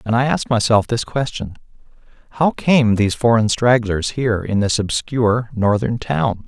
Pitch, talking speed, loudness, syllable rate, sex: 115 Hz, 155 wpm, -17 LUFS, 5.0 syllables/s, male